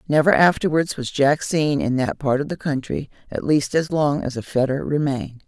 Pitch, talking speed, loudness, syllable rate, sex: 145 Hz, 210 wpm, -21 LUFS, 5.1 syllables/s, female